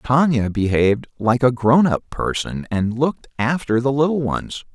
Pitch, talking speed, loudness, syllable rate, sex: 125 Hz, 150 wpm, -19 LUFS, 4.6 syllables/s, male